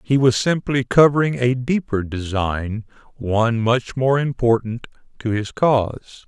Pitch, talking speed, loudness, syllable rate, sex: 120 Hz, 135 wpm, -19 LUFS, 4.2 syllables/s, male